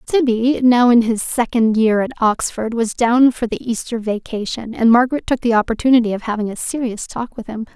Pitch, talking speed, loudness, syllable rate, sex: 235 Hz, 200 wpm, -17 LUFS, 5.3 syllables/s, female